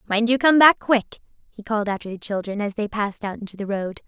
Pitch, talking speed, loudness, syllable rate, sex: 215 Hz, 250 wpm, -21 LUFS, 6.2 syllables/s, female